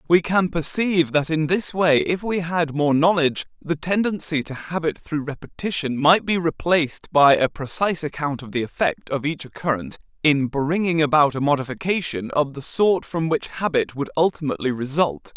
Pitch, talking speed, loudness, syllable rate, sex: 155 Hz, 175 wpm, -21 LUFS, 5.2 syllables/s, male